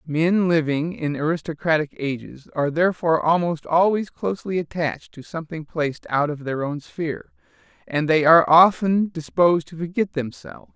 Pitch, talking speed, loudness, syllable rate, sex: 160 Hz, 150 wpm, -21 LUFS, 5.4 syllables/s, male